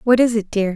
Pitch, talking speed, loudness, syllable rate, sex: 220 Hz, 320 wpm, -18 LUFS, 6.2 syllables/s, female